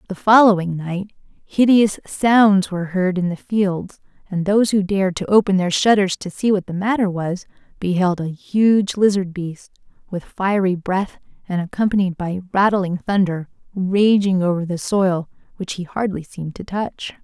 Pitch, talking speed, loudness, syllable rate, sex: 190 Hz, 165 wpm, -19 LUFS, 4.6 syllables/s, female